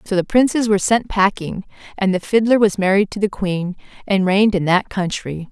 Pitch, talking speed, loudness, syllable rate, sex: 195 Hz, 205 wpm, -17 LUFS, 5.4 syllables/s, female